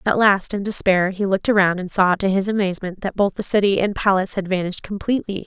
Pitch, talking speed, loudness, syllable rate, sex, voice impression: 195 Hz, 230 wpm, -19 LUFS, 6.4 syllables/s, female, feminine, adult-like, slightly cute, slightly refreshing, slightly sincere, friendly